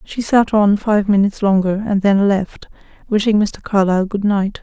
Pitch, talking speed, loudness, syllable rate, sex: 205 Hz, 180 wpm, -16 LUFS, 4.9 syllables/s, female